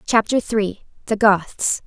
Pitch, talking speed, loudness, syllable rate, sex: 210 Hz, 130 wpm, -19 LUFS, 3.4 syllables/s, female